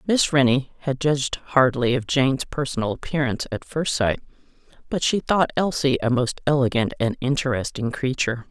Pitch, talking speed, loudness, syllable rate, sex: 135 Hz, 155 wpm, -22 LUFS, 5.5 syllables/s, female